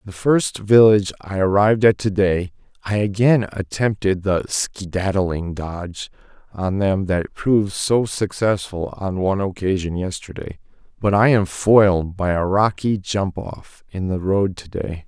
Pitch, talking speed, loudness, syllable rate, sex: 95 Hz, 150 wpm, -19 LUFS, 4.2 syllables/s, male